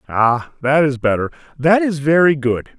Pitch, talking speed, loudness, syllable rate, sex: 145 Hz, 150 wpm, -16 LUFS, 4.4 syllables/s, male